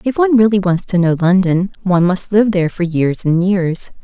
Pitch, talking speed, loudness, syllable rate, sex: 190 Hz, 225 wpm, -14 LUFS, 5.4 syllables/s, female